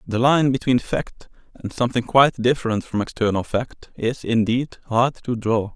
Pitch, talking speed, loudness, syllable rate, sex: 120 Hz, 165 wpm, -21 LUFS, 4.9 syllables/s, male